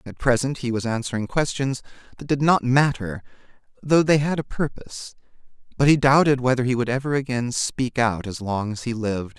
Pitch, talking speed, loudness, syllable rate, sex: 125 Hz, 190 wpm, -22 LUFS, 5.5 syllables/s, male